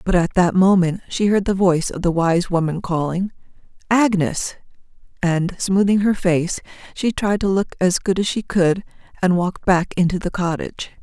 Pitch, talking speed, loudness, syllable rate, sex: 185 Hz, 180 wpm, -19 LUFS, 5.0 syllables/s, female